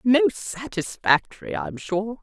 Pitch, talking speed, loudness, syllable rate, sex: 200 Hz, 135 wpm, -24 LUFS, 4.3 syllables/s, female